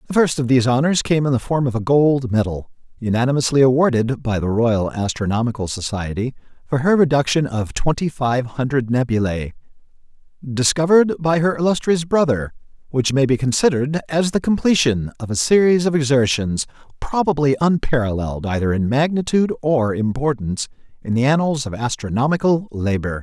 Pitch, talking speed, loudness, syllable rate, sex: 135 Hz, 150 wpm, -18 LUFS, 5.5 syllables/s, male